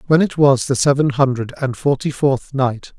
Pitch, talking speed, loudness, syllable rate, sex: 135 Hz, 200 wpm, -17 LUFS, 4.7 syllables/s, male